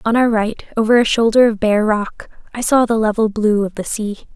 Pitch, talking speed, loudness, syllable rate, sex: 220 Hz, 235 wpm, -16 LUFS, 5.3 syllables/s, female